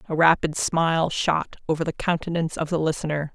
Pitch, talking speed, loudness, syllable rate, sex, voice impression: 160 Hz, 180 wpm, -23 LUFS, 5.9 syllables/s, female, very feminine, very middle-aged, thin, very tensed, powerful, bright, slightly hard, very clear, fluent, slightly raspy, cool, intellectual, slightly refreshing, sincere, calm, slightly friendly, reassuring, very unique, elegant, slightly wild, lively, strict, intense, slightly sharp, slightly light